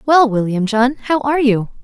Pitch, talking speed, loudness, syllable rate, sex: 245 Hz, 195 wpm, -15 LUFS, 5.5 syllables/s, female